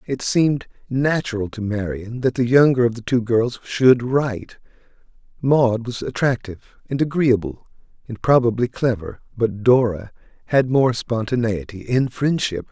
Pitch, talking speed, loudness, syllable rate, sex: 120 Hz, 135 wpm, -20 LUFS, 4.7 syllables/s, male